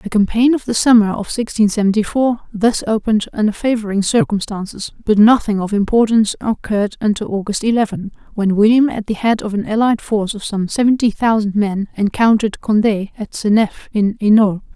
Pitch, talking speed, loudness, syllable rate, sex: 215 Hz, 170 wpm, -16 LUFS, 5.6 syllables/s, female